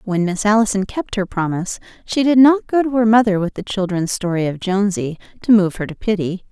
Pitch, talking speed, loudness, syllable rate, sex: 200 Hz, 220 wpm, -17 LUFS, 5.8 syllables/s, female